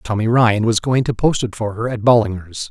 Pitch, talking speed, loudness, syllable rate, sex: 115 Hz, 245 wpm, -17 LUFS, 5.2 syllables/s, male